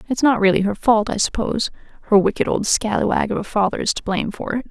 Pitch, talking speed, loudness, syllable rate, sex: 215 Hz, 230 wpm, -19 LUFS, 6.5 syllables/s, female